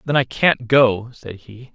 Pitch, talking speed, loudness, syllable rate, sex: 120 Hz, 205 wpm, -17 LUFS, 3.7 syllables/s, male